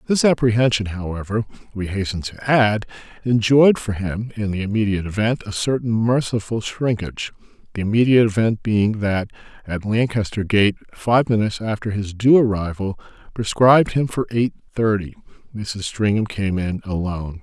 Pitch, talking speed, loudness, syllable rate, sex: 110 Hz, 145 wpm, -20 LUFS, 5.2 syllables/s, male